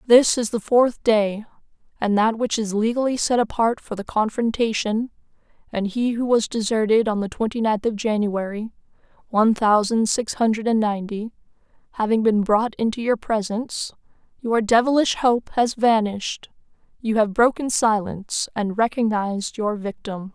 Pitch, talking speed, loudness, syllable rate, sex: 220 Hz, 150 wpm, -21 LUFS, 4.9 syllables/s, female